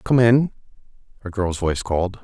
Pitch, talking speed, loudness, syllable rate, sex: 105 Hz, 160 wpm, -20 LUFS, 5.6 syllables/s, male